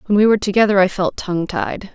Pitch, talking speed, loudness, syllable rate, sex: 195 Hz, 245 wpm, -17 LUFS, 6.7 syllables/s, female